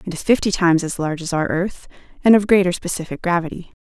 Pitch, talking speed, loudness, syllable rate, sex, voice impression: 175 Hz, 220 wpm, -19 LUFS, 6.8 syllables/s, female, feminine, adult-like, tensed, powerful, slightly soft, clear, intellectual, calm, friendly, reassuring, elegant, kind